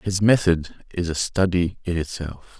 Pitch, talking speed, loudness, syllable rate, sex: 90 Hz, 160 wpm, -22 LUFS, 4.3 syllables/s, male